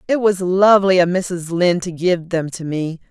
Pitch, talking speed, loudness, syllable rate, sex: 180 Hz, 215 wpm, -17 LUFS, 4.9 syllables/s, female